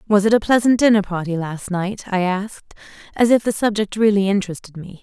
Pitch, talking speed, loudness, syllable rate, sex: 200 Hz, 190 wpm, -18 LUFS, 5.9 syllables/s, female